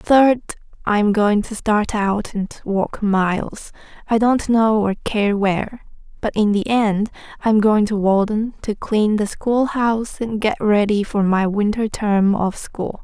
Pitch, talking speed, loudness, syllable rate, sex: 210 Hz, 165 wpm, -19 LUFS, 3.8 syllables/s, female